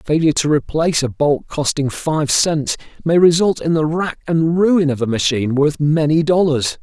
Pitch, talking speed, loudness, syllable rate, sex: 155 Hz, 185 wpm, -16 LUFS, 4.9 syllables/s, male